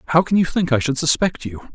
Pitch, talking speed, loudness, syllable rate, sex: 150 Hz, 275 wpm, -18 LUFS, 6.3 syllables/s, male